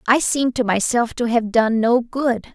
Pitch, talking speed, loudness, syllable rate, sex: 235 Hz, 210 wpm, -19 LUFS, 4.7 syllables/s, female